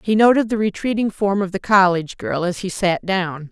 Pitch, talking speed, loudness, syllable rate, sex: 195 Hz, 220 wpm, -19 LUFS, 5.3 syllables/s, female